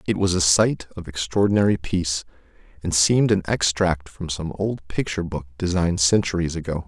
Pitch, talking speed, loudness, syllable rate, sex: 85 Hz, 165 wpm, -22 LUFS, 5.6 syllables/s, male